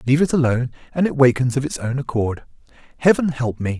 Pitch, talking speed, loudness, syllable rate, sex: 135 Hz, 205 wpm, -19 LUFS, 6.6 syllables/s, male